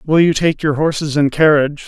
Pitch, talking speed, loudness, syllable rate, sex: 150 Hz, 225 wpm, -14 LUFS, 5.5 syllables/s, male